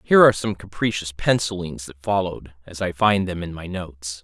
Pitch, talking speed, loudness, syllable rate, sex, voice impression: 90 Hz, 200 wpm, -22 LUFS, 5.5 syllables/s, male, very masculine, very middle-aged, thick, tensed, powerful, slightly bright, soft, slightly muffled, fluent, slightly raspy, cool, intellectual, refreshing, slightly sincere, calm, mature, friendly, reassuring, unique, slightly elegant, wild, slightly sweet, lively, kind, slightly modest